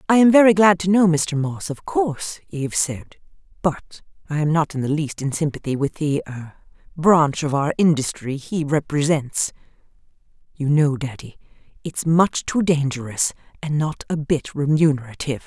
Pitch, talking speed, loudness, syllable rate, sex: 155 Hz, 155 wpm, -20 LUFS, 4.8 syllables/s, female